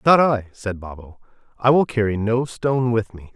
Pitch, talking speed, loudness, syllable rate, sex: 115 Hz, 195 wpm, -20 LUFS, 5.0 syllables/s, male